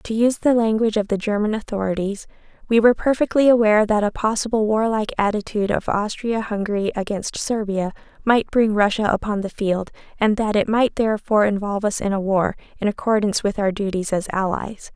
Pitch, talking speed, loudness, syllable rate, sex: 210 Hz, 180 wpm, -20 LUFS, 6.0 syllables/s, female